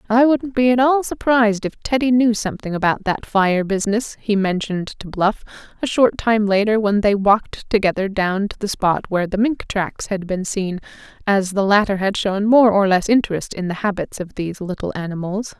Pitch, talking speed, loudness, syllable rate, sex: 205 Hz, 205 wpm, -19 LUFS, 5.3 syllables/s, female